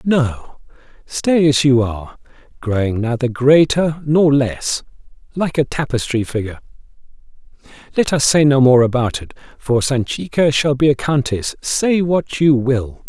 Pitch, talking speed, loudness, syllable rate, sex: 135 Hz, 140 wpm, -16 LUFS, 4.3 syllables/s, male